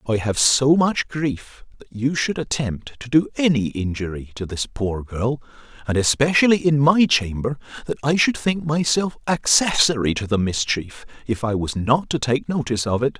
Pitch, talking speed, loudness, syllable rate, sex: 130 Hz, 180 wpm, -20 LUFS, 4.7 syllables/s, male